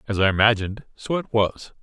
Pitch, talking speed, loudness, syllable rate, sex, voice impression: 110 Hz, 200 wpm, -22 LUFS, 5.8 syllables/s, male, masculine, middle-aged, tensed, powerful, hard, clear, cool, calm, reassuring, wild, lively, slightly strict